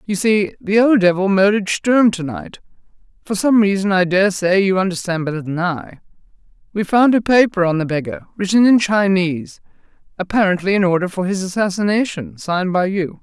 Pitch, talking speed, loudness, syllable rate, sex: 195 Hz, 170 wpm, -16 LUFS, 5.5 syllables/s, female